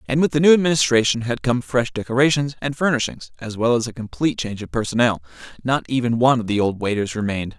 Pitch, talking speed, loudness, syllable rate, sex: 120 Hz, 215 wpm, -20 LUFS, 6.7 syllables/s, male